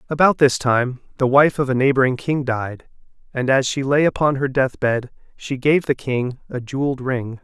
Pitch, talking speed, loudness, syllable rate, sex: 135 Hz, 200 wpm, -19 LUFS, 4.9 syllables/s, male